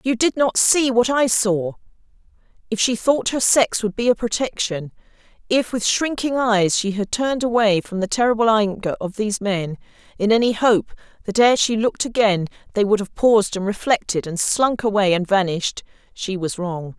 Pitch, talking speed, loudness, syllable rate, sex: 215 Hz, 180 wpm, -19 LUFS, 5.1 syllables/s, female